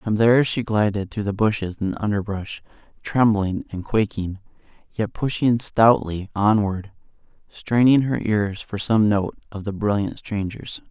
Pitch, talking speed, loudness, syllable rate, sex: 105 Hz, 145 wpm, -21 LUFS, 4.3 syllables/s, male